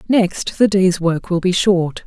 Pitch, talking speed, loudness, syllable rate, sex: 185 Hz, 205 wpm, -16 LUFS, 3.7 syllables/s, female